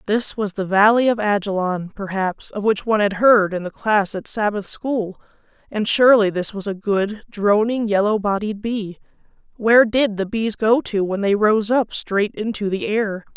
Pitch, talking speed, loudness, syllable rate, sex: 210 Hz, 185 wpm, -19 LUFS, 4.6 syllables/s, female